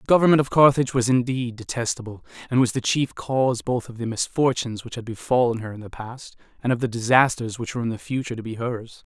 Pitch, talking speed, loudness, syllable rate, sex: 120 Hz, 230 wpm, -22 LUFS, 6.5 syllables/s, male